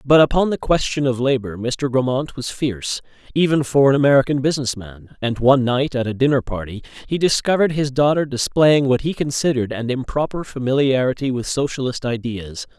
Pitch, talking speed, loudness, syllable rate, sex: 130 Hz, 175 wpm, -19 LUFS, 5.7 syllables/s, male